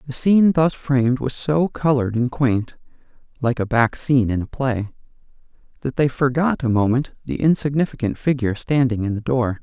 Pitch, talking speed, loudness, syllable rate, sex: 130 Hz, 175 wpm, -20 LUFS, 5.4 syllables/s, male